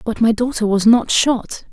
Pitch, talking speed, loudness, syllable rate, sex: 225 Hz, 210 wpm, -16 LUFS, 4.4 syllables/s, female